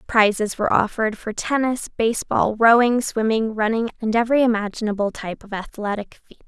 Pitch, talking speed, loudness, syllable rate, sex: 220 Hz, 150 wpm, -20 LUFS, 5.8 syllables/s, female